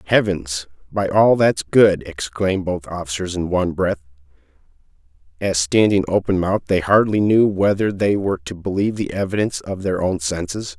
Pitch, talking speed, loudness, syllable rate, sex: 95 Hz, 160 wpm, -19 LUFS, 5.3 syllables/s, male